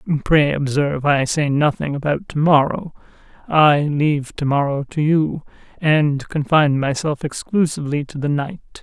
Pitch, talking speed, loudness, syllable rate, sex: 145 Hz, 135 wpm, -18 LUFS, 4.7 syllables/s, female